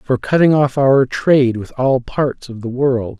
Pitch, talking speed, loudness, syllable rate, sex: 130 Hz, 205 wpm, -15 LUFS, 4.2 syllables/s, male